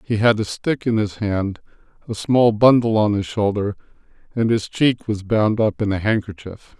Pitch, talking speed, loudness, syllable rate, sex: 105 Hz, 195 wpm, -19 LUFS, 4.6 syllables/s, male